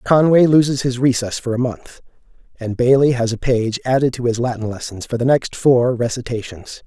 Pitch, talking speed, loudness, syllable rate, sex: 125 Hz, 190 wpm, -17 LUFS, 5.2 syllables/s, male